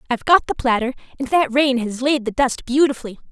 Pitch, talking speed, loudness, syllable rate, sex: 260 Hz, 215 wpm, -18 LUFS, 6.3 syllables/s, female